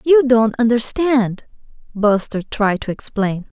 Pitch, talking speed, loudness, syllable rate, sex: 230 Hz, 115 wpm, -17 LUFS, 3.8 syllables/s, female